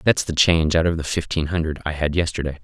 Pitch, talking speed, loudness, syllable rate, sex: 80 Hz, 250 wpm, -21 LUFS, 6.5 syllables/s, male